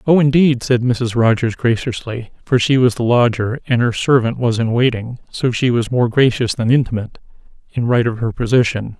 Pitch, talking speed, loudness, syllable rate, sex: 120 Hz, 195 wpm, -16 LUFS, 5.3 syllables/s, male